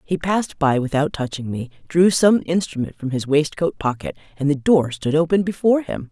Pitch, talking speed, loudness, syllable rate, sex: 155 Hz, 195 wpm, -20 LUFS, 5.3 syllables/s, female